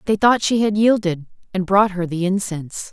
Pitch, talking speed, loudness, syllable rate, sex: 195 Hz, 205 wpm, -19 LUFS, 5.2 syllables/s, female